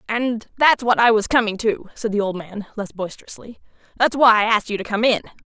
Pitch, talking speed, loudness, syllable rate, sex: 220 Hz, 230 wpm, -19 LUFS, 5.9 syllables/s, female